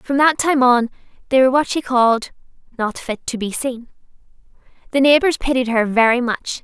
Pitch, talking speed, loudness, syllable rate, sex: 255 Hz, 180 wpm, -17 LUFS, 5.3 syllables/s, female